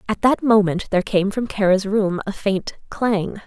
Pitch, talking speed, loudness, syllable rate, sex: 200 Hz, 190 wpm, -20 LUFS, 4.6 syllables/s, female